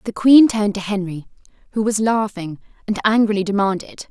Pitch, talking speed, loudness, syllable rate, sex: 205 Hz, 160 wpm, -17 LUFS, 5.6 syllables/s, female